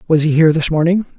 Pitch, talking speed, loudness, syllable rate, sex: 160 Hz, 255 wpm, -14 LUFS, 7.5 syllables/s, male